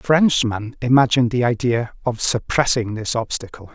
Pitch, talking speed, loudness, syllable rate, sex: 120 Hz, 145 wpm, -19 LUFS, 5.0 syllables/s, male